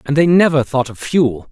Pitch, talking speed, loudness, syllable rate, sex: 145 Hz, 240 wpm, -15 LUFS, 5.0 syllables/s, male